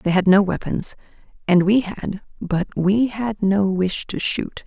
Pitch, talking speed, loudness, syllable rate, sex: 200 Hz, 180 wpm, -20 LUFS, 3.9 syllables/s, female